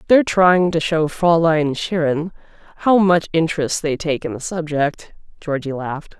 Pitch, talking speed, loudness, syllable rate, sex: 160 Hz, 155 wpm, -18 LUFS, 4.6 syllables/s, female